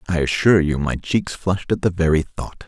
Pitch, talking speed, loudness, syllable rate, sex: 85 Hz, 225 wpm, -19 LUFS, 5.9 syllables/s, male